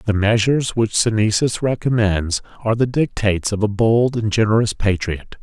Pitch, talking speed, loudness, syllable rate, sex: 110 Hz, 155 wpm, -18 LUFS, 5.1 syllables/s, male